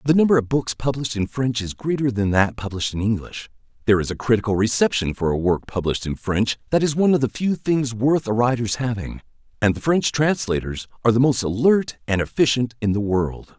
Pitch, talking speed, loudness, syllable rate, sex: 115 Hz, 215 wpm, -21 LUFS, 5.9 syllables/s, male